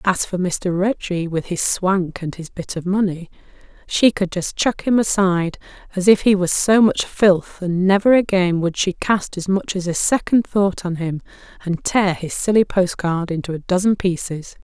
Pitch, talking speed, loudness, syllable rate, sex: 185 Hz, 195 wpm, -19 LUFS, 4.6 syllables/s, female